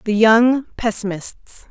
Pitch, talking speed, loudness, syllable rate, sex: 225 Hz, 105 wpm, -16 LUFS, 4.3 syllables/s, female